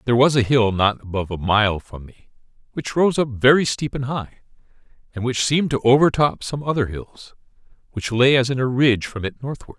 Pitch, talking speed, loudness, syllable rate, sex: 120 Hz, 210 wpm, -19 LUFS, 5.6 syllables/s, male